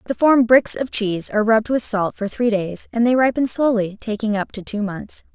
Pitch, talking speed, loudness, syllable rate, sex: 220 Hz, 235 wpm, -19 LUFS, 5.6 syllables/s, female